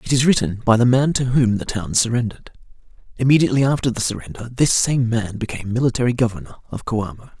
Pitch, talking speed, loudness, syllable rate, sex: 120 Hz, 185 wpm, -19 LUFS, 6.5 syllables/s, male